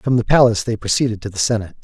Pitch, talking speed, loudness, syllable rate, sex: 110 Hz, 260 wpm, -17 LUFS, 8.0 syllables/s, male